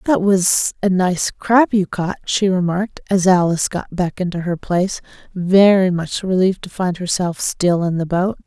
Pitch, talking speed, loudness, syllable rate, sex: 185 Hz, 185 wpm, -17 LUFS, 4.7 syllables/s, female